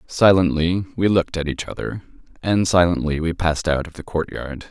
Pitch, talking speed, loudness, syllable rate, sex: 85 Hz, 180 wpm, -20 LUFS, 5.4 syllables/s, male